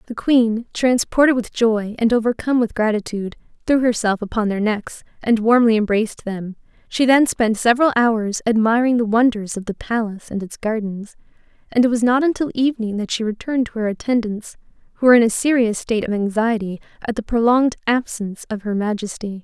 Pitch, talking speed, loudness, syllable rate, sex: 225 Hz, 180 wpm, -19 LUFS, 5.8 syllables/s, female